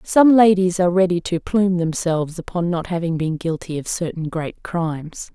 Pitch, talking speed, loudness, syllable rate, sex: 175 Hz, 180 wpm, -19 LUFS, 5.2 syllables/s, female